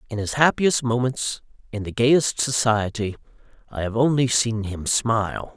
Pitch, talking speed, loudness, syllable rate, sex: 115 Hz, 150 wpm, -22 LUFS, 4.4 syllables/s, male